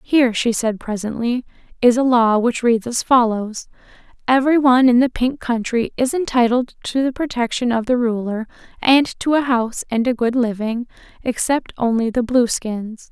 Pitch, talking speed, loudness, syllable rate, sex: 240 Hz, 165 wpm, -18 LUFS, 4.8 syllables/s, female